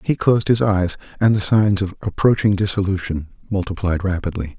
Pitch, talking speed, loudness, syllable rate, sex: 95 Hz, 155 wpm, -19 LUFS, 5.5 syllables/s, male